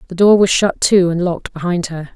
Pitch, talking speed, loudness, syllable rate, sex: 180 Hz, 250 wpm, -14 LUFS, 5.7 syllables/s, female